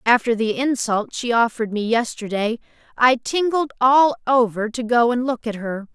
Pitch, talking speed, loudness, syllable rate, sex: 240 Hz, 170 wpm, -20 LUFS, 4.8 syllables/s, female